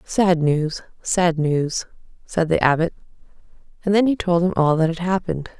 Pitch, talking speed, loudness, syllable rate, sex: 170 Hz, 170 wpm, -20 LUFS, 4.8 syllables/s, female